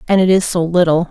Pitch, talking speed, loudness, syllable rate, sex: 175 Hz, 270 wpm, -14 LUFS, 6.3 syllables/s, female